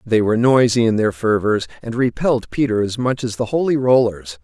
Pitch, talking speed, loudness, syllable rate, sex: 115 Hz, 205 wpm, -18 LUFS, 5.5 syllables/s, male